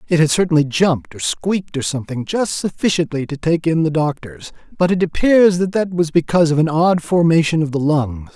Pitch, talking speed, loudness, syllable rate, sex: 160 Hz, 210 wpm, -17 LUFS, 5.6 syllables/s, male